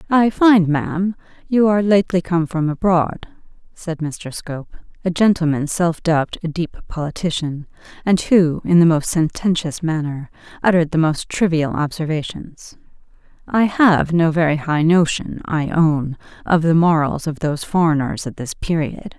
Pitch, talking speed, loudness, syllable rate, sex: 165 Hz, 150 wpm, -18 LUFS, 4.7 syllables/s, female